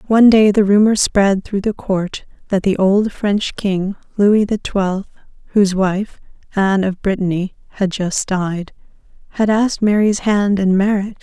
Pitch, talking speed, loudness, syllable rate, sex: 200 Hz, 160 wpm, -16 LUFS, 4.5 syllables/s, female